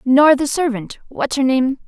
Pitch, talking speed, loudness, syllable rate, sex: 270 Hz, 160 wpm, -16 LUFS, 4.3 syllables/s, female